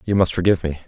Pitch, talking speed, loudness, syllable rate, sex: 90 Hz, 275 wpm, -19 LUFS, 8.5 syllables/s, male